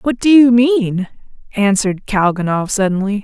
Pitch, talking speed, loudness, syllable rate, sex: 215 Hz, 130 wpm, -14 LUFS, 4.7 syllables/s, female